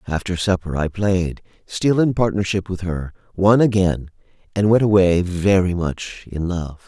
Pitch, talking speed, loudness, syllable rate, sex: 95 Hz, 155 wpm, -19 LUFS, 4.4 syllables/s, male